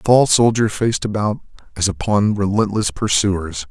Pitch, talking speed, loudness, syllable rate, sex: 100 Hz, 145 wpm, -17 LUFS, 5.0 syllables/s, male